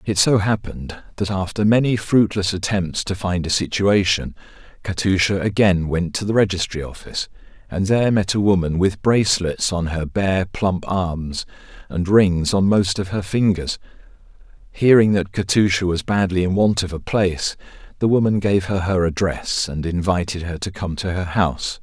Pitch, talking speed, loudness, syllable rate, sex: 95 Hz, 170 wpm, -19 LUFS, 4.9 syllables/s, male